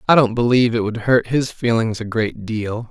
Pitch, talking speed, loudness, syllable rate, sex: 115 Hz, 225 wpm, -18 LUFS, 5.1 syllables/s, male